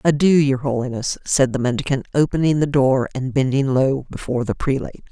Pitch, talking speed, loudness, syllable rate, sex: 135 Hz, 175 wpm, -19 LUFS, 5.7 syllables/s, female